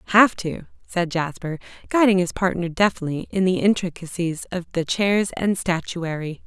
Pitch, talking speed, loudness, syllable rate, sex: 180 Hz, 150 wpm, -22 LUFS, 4.6 syllables/s, female